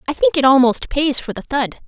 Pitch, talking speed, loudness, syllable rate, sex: 280 Hz, 255 wpm, -16 LUFS, 5.3 syllables/s, female